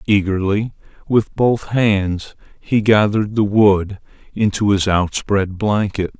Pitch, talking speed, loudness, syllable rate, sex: 105 Hz, 115 wpm, -17 LUFS, 3.7 syllables/s, male